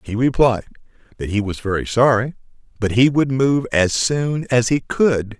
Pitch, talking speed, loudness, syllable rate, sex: 120 Hz, 180 wpm, -18 LUFS, 4.5 syllables/s, male